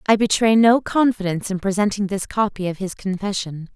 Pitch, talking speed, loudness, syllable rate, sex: 200 Hz, 175 wpm, -20 LUFS, 5.6 syllables/s, female